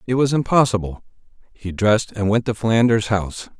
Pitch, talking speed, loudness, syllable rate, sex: 110 Hz, 165 wpm, -19 LUFS, 5.9 syllables/s, male